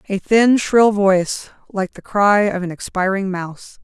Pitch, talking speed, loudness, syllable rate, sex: 195 Hz, 170 wpm, -17 LUFS, 4.4 syllables/s, female